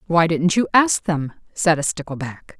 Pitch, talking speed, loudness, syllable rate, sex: 165 Hz, 185 wpm, -19 LUFS, 4.4 syllables/s, female